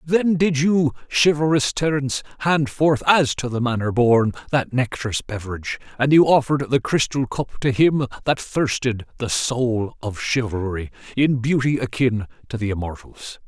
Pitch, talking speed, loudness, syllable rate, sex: 130 Hz, 155 wpm, -20 LUFS, 4.8 syllables/s, male